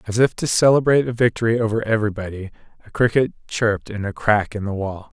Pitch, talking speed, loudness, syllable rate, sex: 110 Hz, 195 wpm, -20 LUFS, 6.5 syllables/s, male